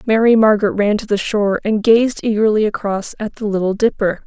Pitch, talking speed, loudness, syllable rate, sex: 215 Hz, 195 wpm, -16 LUFS, 5.6 syllables/s, female